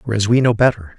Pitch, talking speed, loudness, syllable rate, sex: 110 Hz, 245 wpm, -15 LUFS, 6.7 syllables/s, male